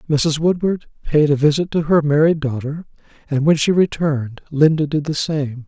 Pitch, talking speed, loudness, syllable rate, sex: 150 Hz, 180 wpm, -18 LUFS, 5.0 syllables/s, male